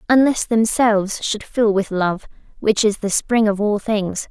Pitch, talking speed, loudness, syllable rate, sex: 210 Hz, 180 wpm, -18 LUFS, 4.2 syllables/s, female